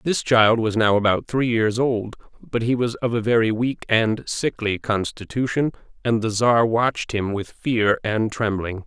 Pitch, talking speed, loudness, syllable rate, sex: 115 Hz, 185 wpm, -21 LUFS, 4.4 syllables/s, male